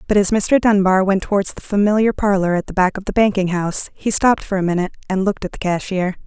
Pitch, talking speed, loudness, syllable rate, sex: 195 Hz, 250 wpm, -18 LUFS, 6.5 syllables/s, female